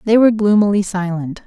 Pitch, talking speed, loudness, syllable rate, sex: 200 Hz, 165 wpm, -15 LUFS, 5.9 syllables/s, female